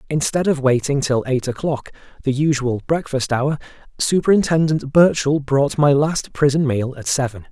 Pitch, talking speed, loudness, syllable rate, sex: 140 Hz, 150 wpm, -18 LUFS, 4.8 syllables/s, male